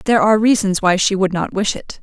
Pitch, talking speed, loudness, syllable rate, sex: 200 Hz, 265 wpm, -16 LUFS, 6.4 syllables/s, female